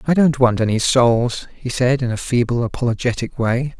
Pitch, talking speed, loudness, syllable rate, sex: 125 Hz, 190 wpm, -18 LUFS, 5.0 syllables/s, male